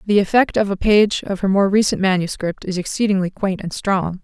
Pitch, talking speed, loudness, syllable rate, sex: 195 Hz, 210 wpm, -18 LUFS, 5.5 syllables/s, female